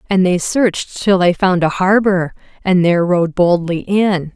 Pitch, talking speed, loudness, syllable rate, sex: 180 Hz, 180 wpm, -15 LUFS, 4.7 syllables/s, female